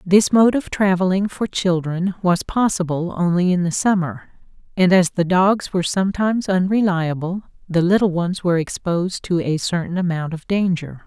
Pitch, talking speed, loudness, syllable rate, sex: 180 Hz, 165 wpm, -19 LUFS, 5.0 syllables/s, female